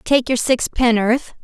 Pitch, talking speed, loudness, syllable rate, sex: 240 Hz, 125 wpm, -17 LUFS, 3.9 syllables/s, female